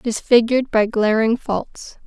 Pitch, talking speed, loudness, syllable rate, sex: 225 Hz, 115 wpm, -18 LUFS, 4.2 syllables/s, female